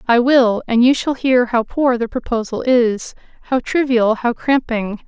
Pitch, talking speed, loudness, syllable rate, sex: 240 Hz, 155 wpm, -16 LUFS, 4.2 syllables/s, female